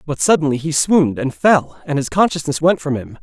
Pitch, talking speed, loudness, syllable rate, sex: 150 Hz, 225 wpm, -16 LUFS, 5.6 syllables/s, male